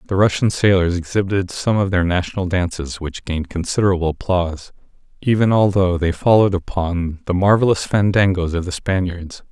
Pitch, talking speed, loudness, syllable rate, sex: 90 Hz, 150 wpm, -18 LUFS, 5.6 syllables/s, male